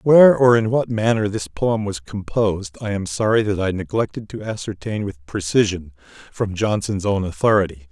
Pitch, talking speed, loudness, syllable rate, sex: 110 Hz, 175 wpm, -20 LUFS, 5.2 syllables/s, male